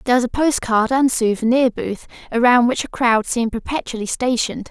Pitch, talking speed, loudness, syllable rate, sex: 240 Hz, 180 wpm, -18 LUFS, 5.8 syllables/s, female